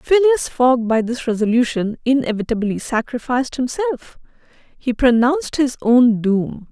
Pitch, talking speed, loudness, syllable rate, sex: 250 Hz, 115 wpm, -18 LUFS, 5.1 syllables/s, female